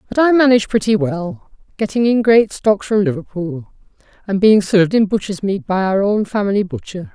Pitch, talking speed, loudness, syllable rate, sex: 205 Hz, 185 wpm, -16 LUFS, 5.3 syllables/s, female